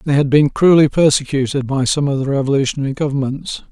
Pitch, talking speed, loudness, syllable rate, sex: 140 Hz, 180 wpm, -15 LUFS, 6.2 syllables/s, male